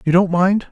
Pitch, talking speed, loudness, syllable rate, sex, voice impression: 185 Hz, 250 wpm, -16 LUFS, 5.1 syllables/s, male, masculine, very adult-like, slightly old, thick, slightly relaxed, slightly weak, slightly dark, slightly soft, slightly muffled, slightly fluent, slightly raspy, slightly cool, intellectual, sincere, slightly calm, mature, very unique, slightly sweet, kind, modest